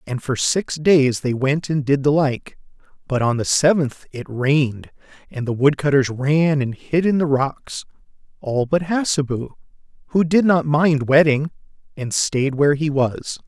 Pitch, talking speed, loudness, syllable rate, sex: 145 Hz, 175 wpm, -19 LUFS, 4.3 syllables/s, male